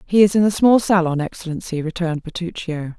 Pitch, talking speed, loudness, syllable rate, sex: 175 Hz, 180 wpm, -19 LUFS, 5.9 syllables/s, female